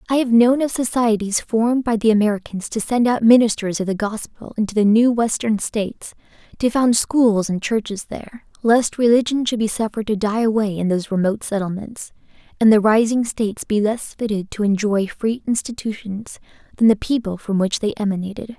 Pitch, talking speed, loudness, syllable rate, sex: 220 Hz, 185 wpm, -19 LUFS, 5.5 syllables/s, female